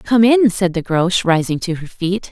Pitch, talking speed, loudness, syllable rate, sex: 190 Hz, 235 wpm, -16 LUFS, 4.7 syllables/s, female